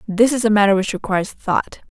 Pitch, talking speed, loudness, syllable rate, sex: 210 Hz, 220 wpm, -18 LUFS, 5.9 syllables/s, female